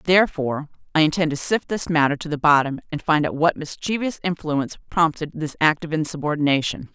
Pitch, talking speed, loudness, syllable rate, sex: 155 Hz, 180 wpm, -21 LUFS, 6.0 syllables/s, female